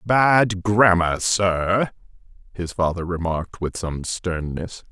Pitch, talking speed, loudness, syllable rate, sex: 90 Hz, 110 wpm, -21 LUFS, 3.4 syllables/s, male